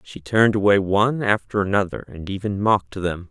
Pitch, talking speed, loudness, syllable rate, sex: 100 Hz, 180 wpm, -20 LUFS, 5.7 syllables/s, male